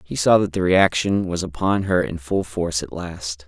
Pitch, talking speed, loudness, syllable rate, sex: 85 Hz, 225 wpm, -21 LUFS, 4.8 syllables/s, male